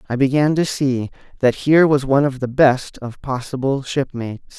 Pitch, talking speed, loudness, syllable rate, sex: 135 Hz, 185 wpm, -18 LUFS, 5.2 syllables/s, male